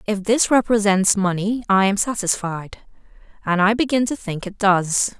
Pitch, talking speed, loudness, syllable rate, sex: 205 Hz, 160 wpm, -19 LUFS, 4.5 syllables/s, female